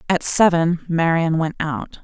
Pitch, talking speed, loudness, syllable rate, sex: 165 Hz, 145 wpm, -18 LUFS, 3.9 syllables/s, female